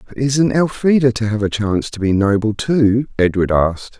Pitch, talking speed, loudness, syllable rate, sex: 115 Hz, 195 wpm, -16 LUFS, 5.1 syllables/s, male